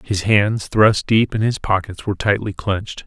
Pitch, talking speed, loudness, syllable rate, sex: 100 Hz, 195 wpm, -18 LUFS, 4.7 syllables/s, male